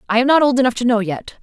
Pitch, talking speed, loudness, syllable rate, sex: 240 Hz, 340 wpm, -16 LUFS, 7.5 syllables/s, female